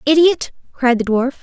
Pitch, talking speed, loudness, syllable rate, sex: 275 Hz, 170 wpm, -16 LUFS, 4.9 syllables/s, female